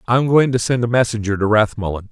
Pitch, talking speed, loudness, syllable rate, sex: 115 Hz, 255 wpm, -17 LUFS, 6.8 syllables/s, male